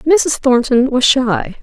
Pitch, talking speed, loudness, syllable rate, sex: 255 Hz, 150 wpm, -13 LUFS, 3.3 syllables/s, female